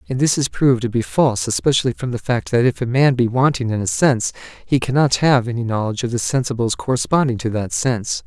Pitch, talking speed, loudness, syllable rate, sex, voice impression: 125 Hz, 230 wpm, -18 LUFS, 6.2 syllables/s, male, masculine, slightly adult-like, slightly fluent, slightly calm, friendly, slightly kind